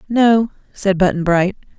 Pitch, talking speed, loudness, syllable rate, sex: 195 Hz, 135 wpm, -16 LUFS, 4.1 syllables/s, female